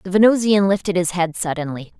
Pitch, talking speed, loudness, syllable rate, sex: 185 Hz, 180 wpm, -18 LUFS, 5.9 syllables/s, female